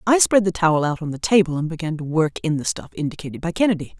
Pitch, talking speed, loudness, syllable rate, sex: 170 Hz, 270 wpm, -21 LUFS, 6.9 syllables/s, female